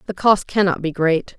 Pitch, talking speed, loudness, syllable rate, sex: 180 Hz, 215 wpm, -18 LUFS, 4.9 syllables/s, female